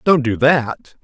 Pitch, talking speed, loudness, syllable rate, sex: 135 Hz, 175 wpm, -15 LUFS, 3.4 syllables/s, male